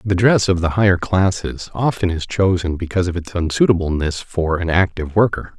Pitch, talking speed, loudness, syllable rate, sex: 90 Hz, 185 wpm, -18 LUFS, 5.5 syllables/s, male